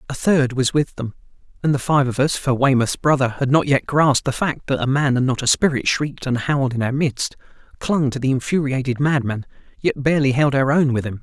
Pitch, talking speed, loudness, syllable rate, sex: 135 Hz, 235 wpm, -19 LUFS, 3.5 syllables/s, male